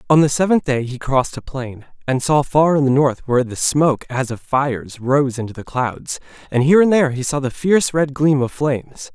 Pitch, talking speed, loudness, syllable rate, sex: 140 Hz, 235 wpm, -18 LUFS, 5.4 syllables/s, male